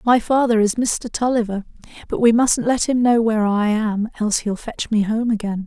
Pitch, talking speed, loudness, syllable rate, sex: 225 Hz, 210 wpm, -19 LUFS, 5.2 syllables/s, female